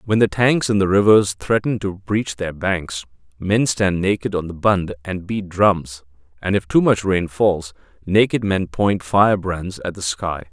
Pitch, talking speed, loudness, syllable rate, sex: 95 Hz, 185 wpm, -19 LUFS, 4.1 syllables/s, male